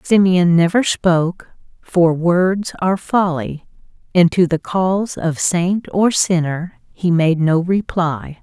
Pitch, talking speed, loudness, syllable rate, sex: 175 Hz, 135 wpm, -16 LUFS, 3.6 syllables/s, female